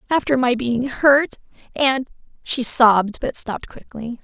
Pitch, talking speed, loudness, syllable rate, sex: 250 Hz, 140 wpm, -18 LUFS, 4.5 syllables/s, female